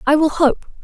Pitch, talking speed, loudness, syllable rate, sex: 300 Hz, 215 wpm, -16 LUFS, 4.9 syllables/s, female